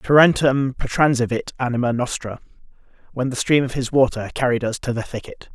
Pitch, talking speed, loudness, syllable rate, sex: 125 Hz, 160 wpm, -20 LUFS, 5.7 syllables/s, male